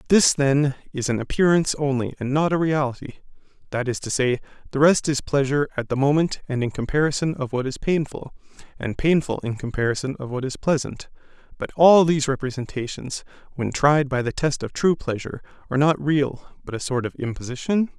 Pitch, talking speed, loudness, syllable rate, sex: 140 Hz, 185 wpm, -22 LUFS, 5.8 syllables/s, male